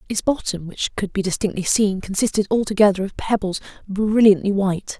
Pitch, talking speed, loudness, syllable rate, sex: 200 Hz, 155 wpm, -20 LUFS, 5.5 syllables/s, female